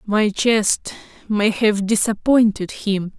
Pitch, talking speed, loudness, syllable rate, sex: 210 Hz, 115 wpm, -18 LUFS, 3.5 syllables/s, female